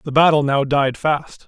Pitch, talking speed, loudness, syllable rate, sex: 145 Hz, 205 wpm, -17 LUFS, 4.4 syllables/s, male